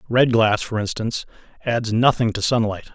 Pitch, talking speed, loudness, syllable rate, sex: 115 Hz, 165 wpm, -20 LUFS, 5.1 syllables/s, male